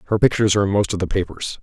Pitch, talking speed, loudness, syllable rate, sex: 100 Hz, 295 wpm, -19 LUFS, 8.6 syllables/s, male